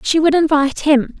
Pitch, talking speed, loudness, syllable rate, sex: 300 Hz, 200 wpm, -15 LUFS, 5.6 syllables/s, female